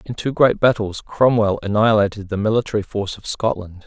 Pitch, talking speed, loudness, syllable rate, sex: 105 Hz, 170 wpm, -19 LUFS, 5.9 syllables/s, male